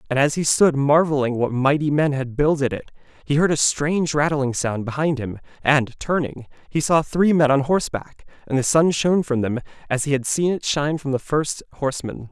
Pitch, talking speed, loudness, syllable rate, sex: 145 Hz, 210 wpm, -20 LUFS, 5.4 syllables/s, male